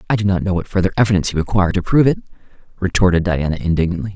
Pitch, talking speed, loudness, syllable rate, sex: 95 Hz, 215 wpm, -17 LUFS, 8.3 syllables/s, male